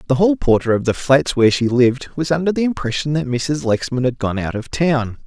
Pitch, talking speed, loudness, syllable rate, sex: 135 Hz, 240 wpm, -18 LUFS, 5.6 syllables/s, male